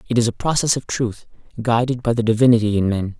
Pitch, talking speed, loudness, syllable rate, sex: 115 Hz, 225 wpm, -19 LUFS, 6.3 syllables/s, male